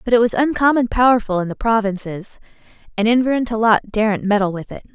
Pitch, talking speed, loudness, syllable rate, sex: 220 Hz, 195 wpm, -17 LUFS, 6.3 syllables/s, female